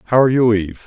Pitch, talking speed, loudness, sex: 115 Hz, 275 wpm, -15 LUFS, male